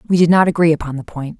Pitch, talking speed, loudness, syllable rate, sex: 160 Hz, 300 wpm, -15 LUFS, 7.0 syllables/s, female